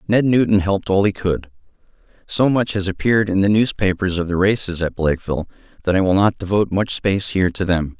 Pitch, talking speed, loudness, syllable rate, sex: 95 Hz, 210 wpm, -18 LUFS, 6.3 syllables/s, male